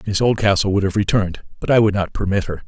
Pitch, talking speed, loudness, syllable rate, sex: 100 Hz, 245 wpm, -18 LUFS, 6.8 syllables/s, male